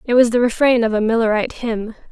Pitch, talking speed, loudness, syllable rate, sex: 230 Hz, 225 wpm, -17 LUFS, 6.4 syllables/s, female